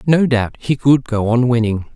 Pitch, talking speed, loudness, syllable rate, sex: 125 Hz, 215 wpm, -16 LUFS, 4.5 syllables/s, male